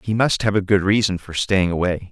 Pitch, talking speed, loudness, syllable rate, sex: 95 Hz, 255 wpm, -19 LUFS, 5.5 syllables/s, male